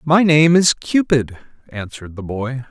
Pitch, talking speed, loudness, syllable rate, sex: 140 Hz, 155 wpm, -15 LUFS, 4.4 syllables/s, male